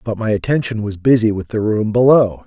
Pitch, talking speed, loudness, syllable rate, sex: 110 Hz, 220 wpm, -16 LUFS, 5.5 syllables/s, male